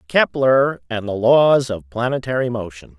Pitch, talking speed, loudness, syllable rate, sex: 120 Hz, 140 wpm, -18 LUFS, 4.4 syllables/s, male